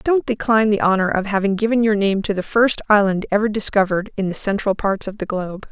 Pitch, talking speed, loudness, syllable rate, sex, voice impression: 205 Hz, 230 wpm, -18 LUFS, 6.2 syllables/s, female, very feminine, very adult-like, middle-aged, slightly thin, slightly tensed, slightly weak, slightly bright, slightly hard, clear, fluent, slightly cute, intellectual, very refreshing, very sincere, very calm, friendly, reassuring, slightly unique, elegant, slightly sweet, slightly lively, kind, slightly sharp, slightly modest